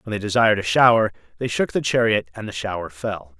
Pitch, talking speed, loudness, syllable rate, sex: 105 Hz, 230 wpm, -20 LUFS, 6.1 syllables/s, male